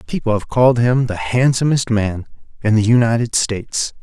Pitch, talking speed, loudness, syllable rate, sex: 115 Hz, 165 wpm, -16 LUFS, 5.1 syllables/s, male